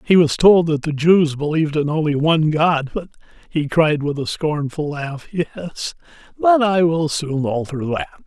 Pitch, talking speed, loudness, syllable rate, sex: 155 Hz, 180 wpm, -18 LUFS, 4.5 syllables/s, male